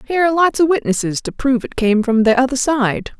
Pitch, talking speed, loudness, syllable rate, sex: 255 Hz, 245 wpm, -16 LUFS, 6.4 syllables/s, female